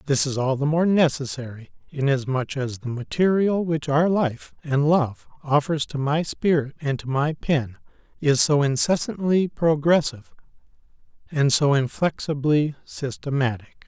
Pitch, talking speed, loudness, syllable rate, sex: 145 Hz, 135 wpm, -22 LUFS, 4.4 syllables/s, male